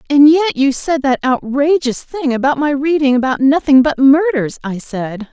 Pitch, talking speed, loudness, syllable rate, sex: 280 Hz, 180 wpm, -14 LUFS, 4.7 syllables/s, female